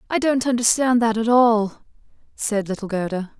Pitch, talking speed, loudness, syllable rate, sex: 225 Hz, 160 wpm, -20 LUFS, 4.9 syllables/s, female